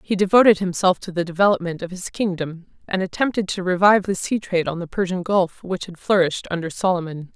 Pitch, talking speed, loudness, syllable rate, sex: 185 Hz, 205 wpm, -20 LUFS, 6.1 syllables/s, female